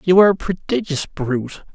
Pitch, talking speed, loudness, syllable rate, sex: 165 Hz, 170 wpm, -19 LUFS, 5.7 syllables/s, male